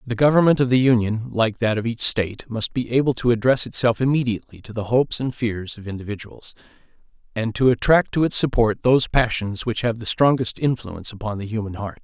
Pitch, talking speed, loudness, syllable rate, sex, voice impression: 115 Hz, 205 wpm, -21 LUFS, 5.9 syllables/s, male, masculine, adult-like, slightly middle-aged, slightly thick, slightly tensed, slightly weak, slightly dark, slightly hard, slightly muffled, fluent, slightly raspy, slightly cool, very intellectual, slightly refreshing, sincere, calm, slightly friendly, slightly reassuring, slightly kind, slightly modest